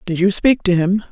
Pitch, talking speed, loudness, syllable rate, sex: 195 Hz, 270 wpm, -16 LUFS, 5.3 syllables/s, female